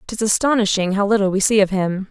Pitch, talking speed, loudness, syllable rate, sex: 205 Hz, 230 wpm, -17 LUFS, 6.0 syllables/s, female